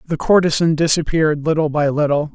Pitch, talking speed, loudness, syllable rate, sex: 155 Hz, 155 wpm, -16 LUFS, 5.8 syllables/s, male